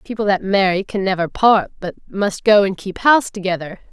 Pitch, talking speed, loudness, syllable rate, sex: 200 Hz, 200 wpm, -17 LUFS, 5.4 syllables/s, female